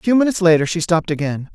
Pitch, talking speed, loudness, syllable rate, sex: 175 Hz, 270 wpm, -17 LUFS, 8.1 syllables/s, male